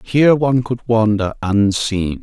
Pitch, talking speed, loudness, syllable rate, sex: 115 Hz, 135 wpm, -16 LUFS, 4.5 syllables/s, male